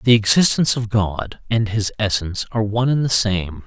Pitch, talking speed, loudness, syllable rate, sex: 110 Hz, 195 wpm, -19 LUFS, 5.5 syllables/s, male